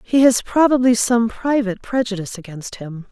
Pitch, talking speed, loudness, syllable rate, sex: 225 Hz, 155 wpm, -17 LUFS, 5.4 syllables/s, female